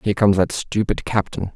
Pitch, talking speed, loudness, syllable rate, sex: 100 Hz, 195 wpm, -20 LUFS, 6.0 syllables/s, male